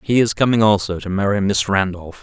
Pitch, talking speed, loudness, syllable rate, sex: 100 Hz, 215 wpm, -17 LUFS, 5.6 syllables/s, male